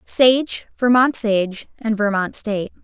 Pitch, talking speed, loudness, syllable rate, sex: 220 Hz, 125 wpm, -18 LUFS, 3.7 syllables/s, female